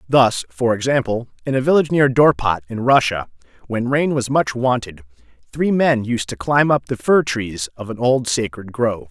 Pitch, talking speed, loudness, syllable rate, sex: 120 Hz, 190 wpm, -18 LUFS, 4.9 syllables/s, male